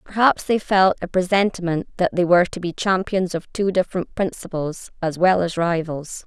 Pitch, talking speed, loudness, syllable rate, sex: 180 Hz, 180 wpm, -21 LUFS, 5.1 syllables/s, female